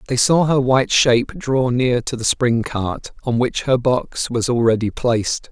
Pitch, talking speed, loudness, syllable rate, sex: 125 Hz, 195 wpm, -18 LUFS, 4.4 syllables/s, male